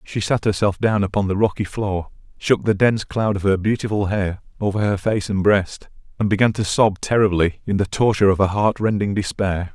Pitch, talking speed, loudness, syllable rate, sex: 100 Hz, 205 wpm, -20 LUFS, 5.4 syllables/s, male